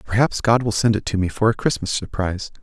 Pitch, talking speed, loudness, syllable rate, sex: 105 Hz, 250 wpm, -20 LUFS, 6.2 syllables/s, male